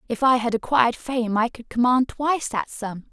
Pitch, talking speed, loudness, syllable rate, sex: 240 Hz, 210 wpm, -22 LUFS, 5.1 syllables/s, female